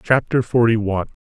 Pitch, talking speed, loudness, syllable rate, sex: 115 Hz, 145 wpm, -18 LUFS, 6.1 syllables/s, male